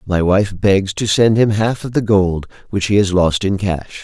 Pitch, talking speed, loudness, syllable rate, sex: 100 Hz, 240 wpm, -16 LUFS, 4.4 syllables/s, male